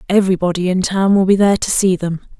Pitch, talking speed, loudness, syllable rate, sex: 185 Hz, 225 wpm, -15 LUFS, 6.6 syllables/s, female